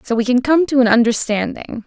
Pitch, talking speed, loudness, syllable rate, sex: 245 Hz, 225 wpm, -15 LUFS, 5.7 syllables/s, female